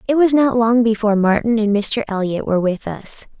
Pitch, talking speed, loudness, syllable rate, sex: 225 Hz, 210 wpm, -17 LUFS, 5.5 syllables/s, female